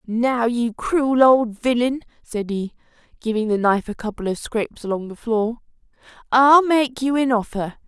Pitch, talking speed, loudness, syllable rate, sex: 235 Hz, 170 wpm, -20 LUFS, 4.7 syllables/s, female